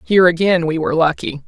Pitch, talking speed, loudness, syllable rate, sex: 170 Hz, 205 wpm, -16 LUFS, 6.8 syllables/s, female